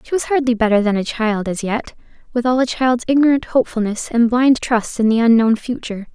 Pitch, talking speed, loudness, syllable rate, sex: 235 Hz, 215 wpm, -17 LUFS, 5.7 syllables/s, female